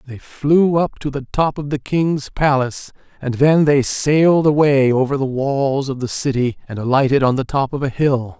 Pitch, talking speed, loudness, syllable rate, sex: 140 Hz, 205 wpm, -17 LUFS, 4.8 syllables/s, male